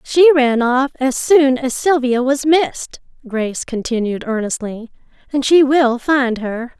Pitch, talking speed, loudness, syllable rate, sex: 260 Hz, 150 wpm, -16 LUFS, 4.1 syllables/s, female